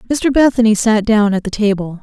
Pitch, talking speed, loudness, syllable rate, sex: 220 Hz, 210 wpm, -14 LUFS, 5.5 syllables/s, female